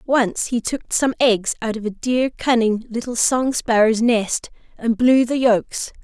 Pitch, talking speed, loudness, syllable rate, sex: 235 Hz, 180 wpm, -19 LUFS, 4.0 syllables/s, female